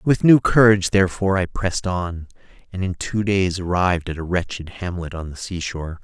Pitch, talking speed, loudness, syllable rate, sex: 90 Hz, 190 wpm, -20 LUFS, 5.6 syllables/s, male